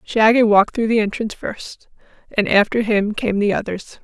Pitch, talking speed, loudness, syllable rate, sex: 215 Hz, 180 wpm, -18 LUFS, 5.1 syllables/s, female